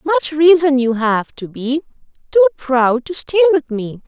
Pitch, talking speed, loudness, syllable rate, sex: 290 Hz, 175 wpm, -15 LUFS, 4.1 syllables/s, female